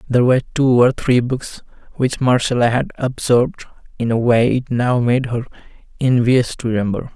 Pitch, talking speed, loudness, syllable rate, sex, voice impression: 120 Hz, 170 wpm, -17 LUFS, 5.1 syllables/s, male, masculine, slightly adult-like, slightly halting, slightly calm, unique